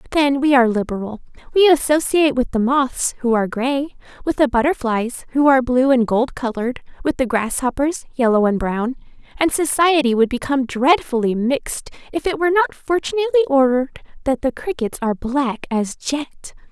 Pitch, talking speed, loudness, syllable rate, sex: 265 Hz, 165 wpm, -18 LUFS, 5.5 syllables/s, female